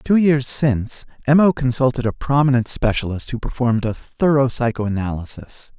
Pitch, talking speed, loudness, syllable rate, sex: 125 Hz, 145 wpm, -19 LUFS, 5.1 syllables/s, male